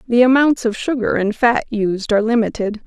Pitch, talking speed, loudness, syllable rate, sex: 230 Hz, 190 wpm, -17 LUFS, 5.3 syllables/s, female